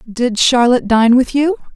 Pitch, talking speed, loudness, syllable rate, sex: 250 Hz, 170 wpm, -13 LUFS, 4.8 syllables/s, female